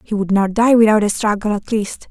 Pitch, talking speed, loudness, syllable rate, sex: 210 Hz, 255 wpm, -16 LUFS, 5.5 syllables/s, female